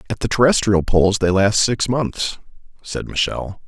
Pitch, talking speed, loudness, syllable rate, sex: 110 Hz, 165 wpm, -18 LUFS, 4.7 syllables/s, male